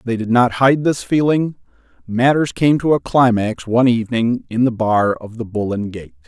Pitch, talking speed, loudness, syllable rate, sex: 120 Hz, 200 wpm, -17 LUFS, 4.9 syllables/s, male